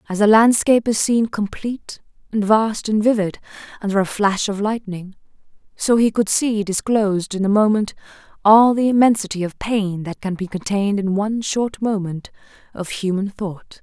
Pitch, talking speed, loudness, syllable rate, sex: 205 Hz, 170 wpm, -18 LUFS, 5.0 syllables/s, female